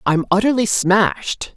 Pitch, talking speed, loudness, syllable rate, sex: 205 Hz, 115 wpm, -17 LUFS, 4.4 syllables/s, female